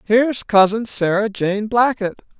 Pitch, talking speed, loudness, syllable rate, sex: 215 Hz, 125 wpm, -18 LUFS, 4.2 syllables/s, male